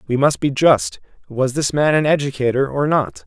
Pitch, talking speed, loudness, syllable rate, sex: 140 Hz, 200 wpm, -17 LUFS, 4.9 syllables/s, male